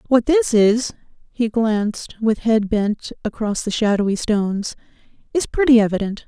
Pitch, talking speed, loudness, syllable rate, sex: 220 Hz, 135 wpm, -19 LUFS, 4.8 syllables/s, female